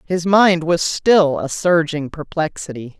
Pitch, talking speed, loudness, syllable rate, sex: 165 Hz, 140 wpm, -17 LUFS, 3.8 syllables/s, female